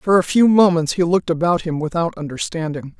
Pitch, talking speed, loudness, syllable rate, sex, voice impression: 170 Hz, 200 wpm, -18 LUFS, 5.8 syllables/s, female, slightly masculine, very adult-like, slightly muffled, unique